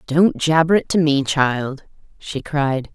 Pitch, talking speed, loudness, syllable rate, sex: 150 Hz, 165 wpm, -18 LUFS, 3.6 syllables/s, female